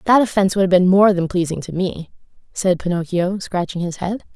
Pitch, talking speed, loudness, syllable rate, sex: 185 Hz, 205 wpm, -18 LUFS, 5.7 syllables/s, female